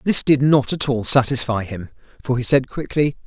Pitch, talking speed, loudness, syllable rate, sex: 130 Hz, 200 wpm, -18 LUFS, 5.1 syllables/s, male